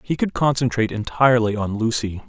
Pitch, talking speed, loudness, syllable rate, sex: 120 Hz, 160 wpm, -20 LUFS, 6.0 syllables/s, male